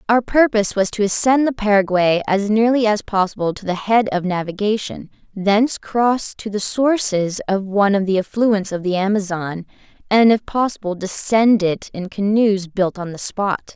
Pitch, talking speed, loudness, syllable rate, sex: 205 Hz, 175 wpm, -18 LUFS, 4.8 syllables/s, female